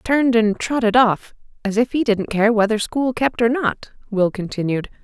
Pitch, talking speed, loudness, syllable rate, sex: 225 Hz, 190 wpm, -19 LUFS, 4.7 syllables/s, female